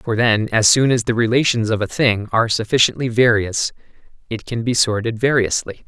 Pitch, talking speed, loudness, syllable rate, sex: 115 Hz, 185 wpm, -17 LUFS, 5.4 syllables/s, male